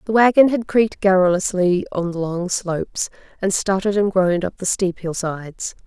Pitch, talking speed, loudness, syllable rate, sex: 190 Hz, 185 wpm, -19 LUFS, 5.3 syllables/s, female